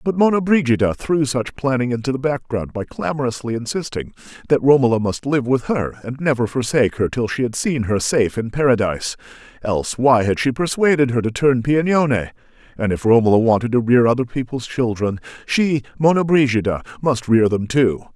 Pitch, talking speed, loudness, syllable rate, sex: 125 Hz, 175 wpm, -18 LUFS, 5.6 syllables/s, male